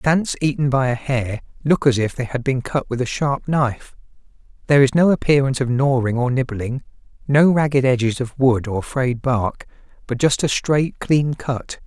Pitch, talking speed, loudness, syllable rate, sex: 130 Hz, 190 wpm, -19 LUFS, 4.8 syllables/s, male